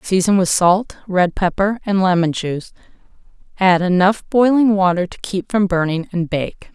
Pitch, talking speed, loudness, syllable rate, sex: 190 Hz, 160 wpm, -17 LUFS, 4.6 syllables/s, female